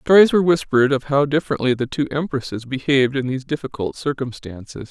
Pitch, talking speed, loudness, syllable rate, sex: 135 Hz, 170 wpm, -19 LUFS, 6.4 syllables/s, male